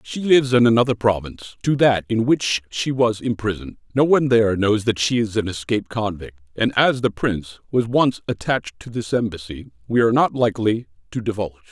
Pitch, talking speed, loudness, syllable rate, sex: 110 Hz, 195 wpm, -20 LUFS, 6.1 syllables/s, male